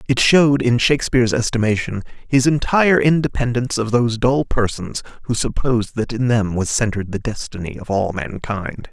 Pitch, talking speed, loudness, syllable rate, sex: 120 Hz, 160 wpm, -18 LUFS, 5.5 syllables/s, male